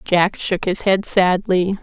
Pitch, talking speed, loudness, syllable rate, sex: 185 Hz, 165 wpm, -18 LUFS, 3.5 syllables/s, female